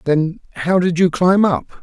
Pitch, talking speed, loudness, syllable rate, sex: 170 Hz, 195 wpm, -16 LUFS, 4.7 syllables/s, male